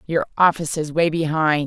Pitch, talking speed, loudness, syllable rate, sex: 155 Hz, 180 wpm, -20 LUFS, 5.3 syllables/s, female